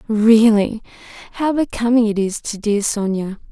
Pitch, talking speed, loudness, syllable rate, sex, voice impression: 220 Hz, 135 wpm, -17 LUFS, 4.4 syllables/s, female, gender-neutral, young, relaxed, soft, muffled, slightly raspy, calm, kind, modest, slightly light